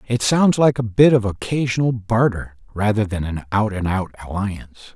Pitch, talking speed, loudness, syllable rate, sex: 110 Hz, 180 wpm, -19 LUFS, 5.1 syllables/s, male